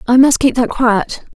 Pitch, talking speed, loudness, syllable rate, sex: 245 Hz, 220 wpm, -13 LUFS, 4.5 syllables/s, female